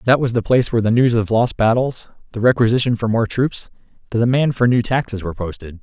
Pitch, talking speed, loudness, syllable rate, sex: 115 Hz, 225 wpm, -17 LUFS, 6.4 syllables/s, male